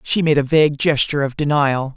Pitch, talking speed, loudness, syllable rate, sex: 145 Hz, 215 wpm, -17 LUFS, 6.0 syllables/s, male